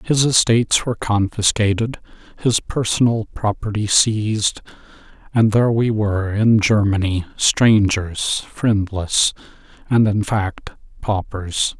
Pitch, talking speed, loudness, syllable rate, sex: 105 Hz, 100 wpm, -18 LUFS, 4.0 syllables/s, male